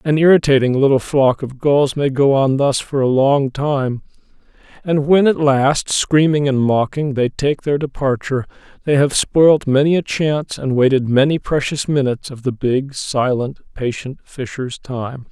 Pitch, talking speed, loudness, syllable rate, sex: 140 Hz, 170 wpm, -16 LUFS, 4.5 syllables/s, male